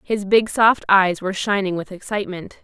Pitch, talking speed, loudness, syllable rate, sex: 195 Hz, 180 wpm, -19 LUFS, 5.2 syllables/s, female